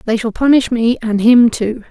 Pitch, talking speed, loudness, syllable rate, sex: 235 Hz, 220 wpm, -13 LUFS, 4.7 syllables/s, female